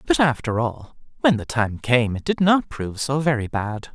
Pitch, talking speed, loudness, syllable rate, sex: 130 Hz, 215 wpm, -21 LUFS, 4.8 syllables/s, male